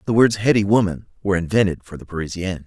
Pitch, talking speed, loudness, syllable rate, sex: 95 Hz, 200 wpm, -20 LUFS, 7.2 syllables/s, male